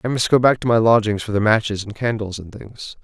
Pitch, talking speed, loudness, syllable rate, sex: 110 Hz, 275 wpm, -18 LUFS, 5.9 syllables/s, male